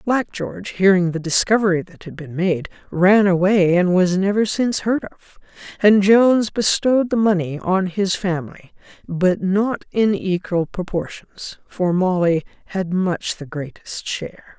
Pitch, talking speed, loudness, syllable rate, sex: 190 Hz, 150 wpm, -19 LUFS, 4.4 syllables/s, female